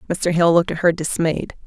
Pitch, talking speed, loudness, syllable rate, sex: 170 Hz, 215 wpm, -19 LUFS, 5.6 syllables/s, female